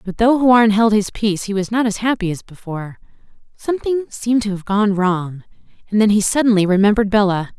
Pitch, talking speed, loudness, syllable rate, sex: 210 Hz, 200 wpm, -17 LUFS, 6.0 syllables/s, female